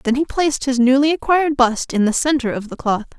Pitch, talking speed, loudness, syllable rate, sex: 265 Hz, 245 wpm, -17 LUFS, 6.1 syllables/s, female